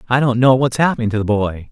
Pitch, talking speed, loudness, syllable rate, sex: 120 Hz, 280 wpm, -16 LUFS, 6.6 syllables/s, male